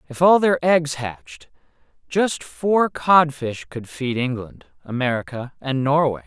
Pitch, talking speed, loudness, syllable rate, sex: 145 Hz, 135 wpm, -20 LUFS, 4.0 syllables/s, male